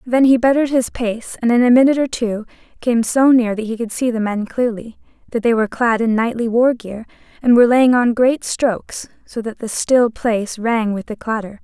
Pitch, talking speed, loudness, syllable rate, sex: 235 Hz, 225 wpm, -17 LUFS, 5.4 syllables/s, female